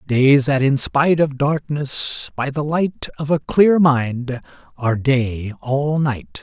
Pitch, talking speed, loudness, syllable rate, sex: 140 Hz, 160 wpm, -18 LUFS, 3.5 syllables/s, male